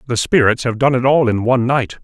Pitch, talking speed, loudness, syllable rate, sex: 125 Hz, 265 wpm, -15 LUFS, 6.1 syllables/s, male